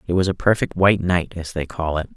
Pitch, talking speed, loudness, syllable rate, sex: 85 Hz, 280 wpm, -20 LUFS, 6.1 syllables/s, male